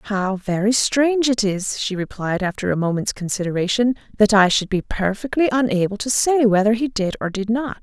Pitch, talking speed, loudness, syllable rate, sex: 215 Hz, 190 wpm, -19 LUFS, 5.2 syllables/s, female